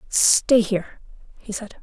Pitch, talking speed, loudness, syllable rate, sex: 210 Hz, 130 wpm, -18 LUFS, 3.9 syllables/s, female